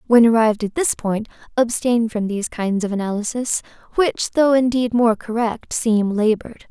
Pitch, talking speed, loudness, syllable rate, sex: 225 Hz, 160 wpm, -19 LUFS, 4.9 syllables/s, female